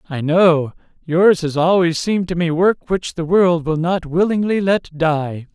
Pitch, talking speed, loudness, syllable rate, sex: 170 Hz, 185 wpm, -17 LUFS, 4.2 syllables/s, male